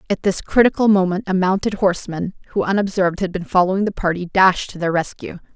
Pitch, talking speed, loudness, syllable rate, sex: 190 Hz, 195 wpm, -18 LUFS, 6.2 syllables/s, female